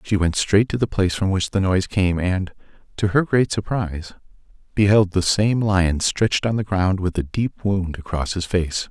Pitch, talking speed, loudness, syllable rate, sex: 95 Hz, 210 wpm, -20 LUFS, 4.9 syllables/s, male